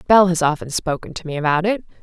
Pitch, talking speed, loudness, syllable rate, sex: 170 Hz, 235 wpm, -19 LUFS, 6.4 syllables/s, female